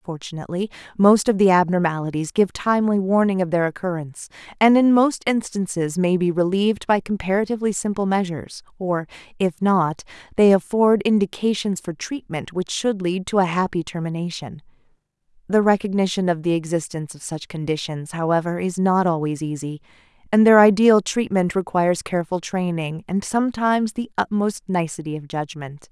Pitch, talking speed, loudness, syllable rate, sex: 185 Hz, 150 wpm, -21 LUFS, 5.5 syllables/s, female